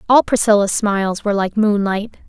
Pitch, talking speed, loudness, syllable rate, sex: 205 Hz, 160 wpm, -16 LUFS, 5.5 syllables/s, female